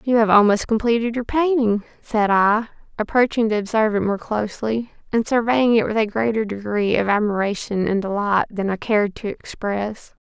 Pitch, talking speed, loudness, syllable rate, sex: 220 Hz, 175 wpm, -20 LUFS, 5.3 syllables/s, female